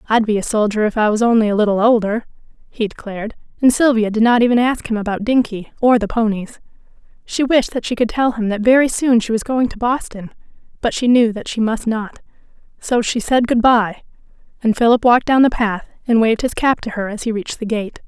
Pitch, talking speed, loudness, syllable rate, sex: 225 Hz, 230 wpm, -17 LUFS, 5.9 syllables/s, female